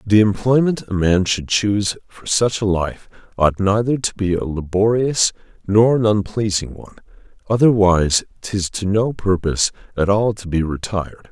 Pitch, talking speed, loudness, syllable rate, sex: 100 Hz, 160 wpm, -18 LUFS, 4.9 syllables/s, male